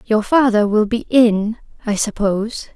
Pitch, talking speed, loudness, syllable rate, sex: 220 Hz, 155 wpm, -17 LUFS, 4.4 syllables/s, female